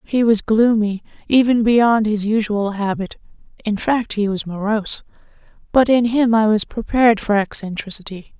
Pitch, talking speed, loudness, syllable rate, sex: 215 Hz, 135 wpm, -17 LUFS, 4.8 syllables/s, female